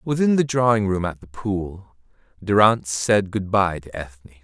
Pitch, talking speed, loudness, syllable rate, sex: 100 Hz, 175 wpm, -20 LUFS, 4.7 syllables/s, male